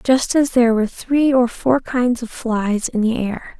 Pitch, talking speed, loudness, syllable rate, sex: 240 Hz, 215 wpm, -18 LUFS, 4.2 syllables/s, female